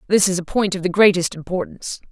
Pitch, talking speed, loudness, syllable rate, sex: 185 Hz, 225 wpm, -19 LUFS, 6.6 syllables/s, female